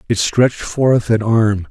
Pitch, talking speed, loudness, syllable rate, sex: 115 Hz, 175 wpm, -15 LUFS, 4.0 syllables/s, male